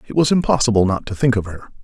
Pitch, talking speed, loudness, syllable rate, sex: 120 Hz, 260 wpm, -17 LUFS, 7.4 syllables/s, male